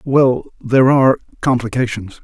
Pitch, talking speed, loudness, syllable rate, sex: 125 Hz, 105 wpm, -15 LUFS, 4.9 syllables/s, male